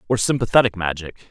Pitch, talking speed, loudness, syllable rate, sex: 105 Hz, 140 wpm, -19 LUFS, 6.1 syllables/s, male